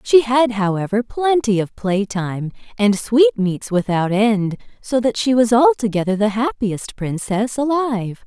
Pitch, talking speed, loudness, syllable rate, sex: 225 Hz, 145 wpm, -18 LUFS, 4.2 syllables/s, female